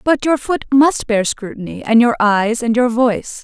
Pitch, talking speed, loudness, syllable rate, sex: 240 Hz, 210 wpm, -15 LUFS, 4.7 syllables/s, female